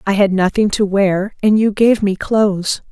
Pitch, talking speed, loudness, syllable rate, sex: 200 Hz, 205 wpm, -15 LUFS, 4.5 syllables/s, female